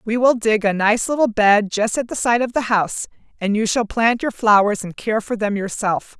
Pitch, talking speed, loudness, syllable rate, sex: 220 Hz, 240 wpm, -18 LUFS, 5.0 syllables/s, female